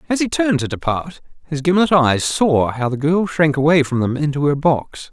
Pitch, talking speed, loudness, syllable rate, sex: 150 Hz, 225 wpm, -17 LUFS, 5.2 syllables/s, male